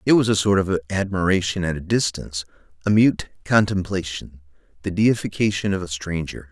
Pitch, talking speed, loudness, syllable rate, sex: 95 Hz, 155 wpm, -21 LUFS, 5.4 syllables/s, male